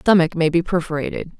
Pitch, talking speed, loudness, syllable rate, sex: 170 Hz, 170 wpm, -19 LUFS, 6.1 syllables/s, female